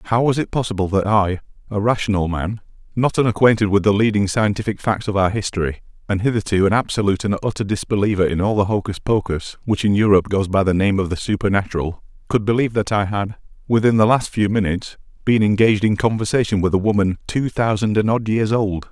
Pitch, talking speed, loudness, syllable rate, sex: 105 Hz, 205 wpm, -19 LUFS, 6.3 syllables/s, male